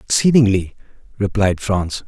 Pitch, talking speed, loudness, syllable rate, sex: 105 Hz, 85 wpm, -17 LUFS, 4.3 syllables/s, male